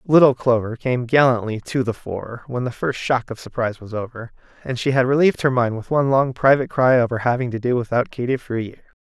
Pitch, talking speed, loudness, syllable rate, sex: 125 Hz, 230 wpm, -20 LUFS, 6.1 syllables/s, male